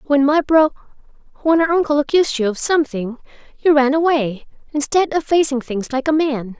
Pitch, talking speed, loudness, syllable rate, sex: 285 Hz, 165 wpm, -17 LUFS, 5.5 syllables/s, female